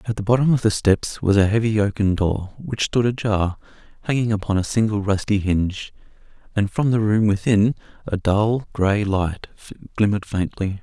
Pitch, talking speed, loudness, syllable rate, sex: 105 Hz, 170 wpm, -20 LUFS, 5.1 syllables/s, male